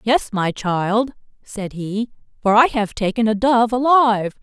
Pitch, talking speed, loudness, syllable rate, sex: 220 Hz, 165 wpm, -18 LUFS, 4.1 syllables/s, female